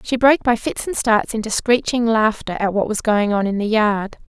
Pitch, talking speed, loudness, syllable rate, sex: 220 Hz, 235 wpm, -18 LUFS, 5.1 syllables/s, female